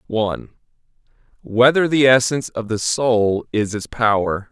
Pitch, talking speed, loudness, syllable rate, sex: 115 Hz, 135 wpm, -18 LUFS, 4.8 syllables/s, male